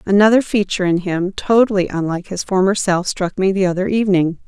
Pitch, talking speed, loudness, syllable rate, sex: 190 Hz, 190 wpm, -17 LUFS, 6.1 syllables/s, female